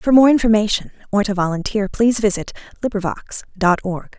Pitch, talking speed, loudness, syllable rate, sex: 205 Hz, 160 wpm, -18 LUFS, 5.7 syllables/s, female